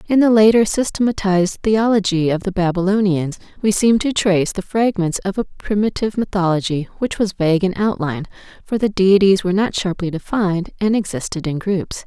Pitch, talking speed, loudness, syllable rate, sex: 195 Hz, 170 wpm, -18 LUFS, 5.6 syllables/s, female